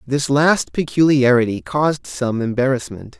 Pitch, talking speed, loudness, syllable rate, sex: 135 Hz, 115 wpm, -17 LUFS, 4.6 syllables/s, male